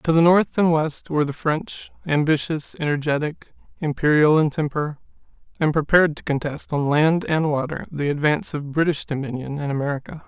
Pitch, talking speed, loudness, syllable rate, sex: 150 Hz, 165 wpm, -21 LUFS, 5.3 syllables/s, male